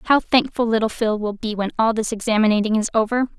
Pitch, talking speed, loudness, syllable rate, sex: 220 Hz, 215 wpm, -20 LUFS, 6.0 syllables/s, female